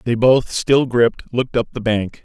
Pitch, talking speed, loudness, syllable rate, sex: 120 Hz, 215 wpm, -17 LUFS, 4.9 syllables/s, male